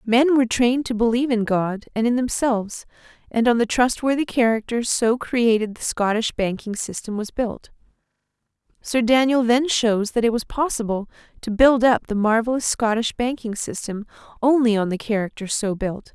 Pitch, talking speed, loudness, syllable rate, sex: 230 Hz, 165 wpm, -21 LUFS, 5.1 syllables/s, female